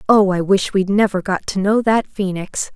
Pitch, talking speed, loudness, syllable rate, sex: 195 Hz, 220 wpm, -17 LUFS, 4.7 syllables/s, female